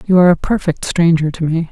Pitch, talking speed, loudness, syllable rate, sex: 170 Hz, 245 wpm, -14 LUFS, 6.4 syllables/s, female